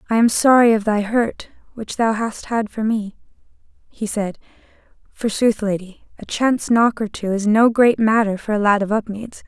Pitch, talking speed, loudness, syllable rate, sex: 220 Hz, 190 wpm, -18 LUFS, 4.8 syllables/s, female